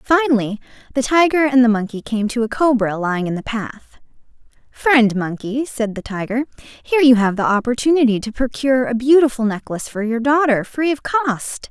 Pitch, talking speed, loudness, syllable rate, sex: 245 Hz, 180 wpm, -17 LUFS, 5.3 syllables/s, female